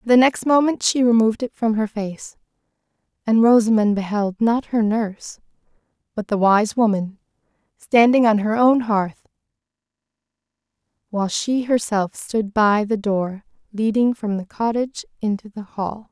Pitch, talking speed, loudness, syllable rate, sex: 220 Hz, 135 wpm, -19 LUFS, 4.6 syllables/s, female